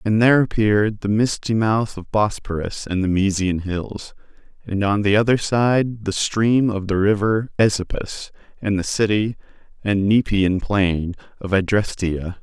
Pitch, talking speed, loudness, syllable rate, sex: 105 Hz, 150 wpm, -20 LUFS, 4.3 syllables/s, male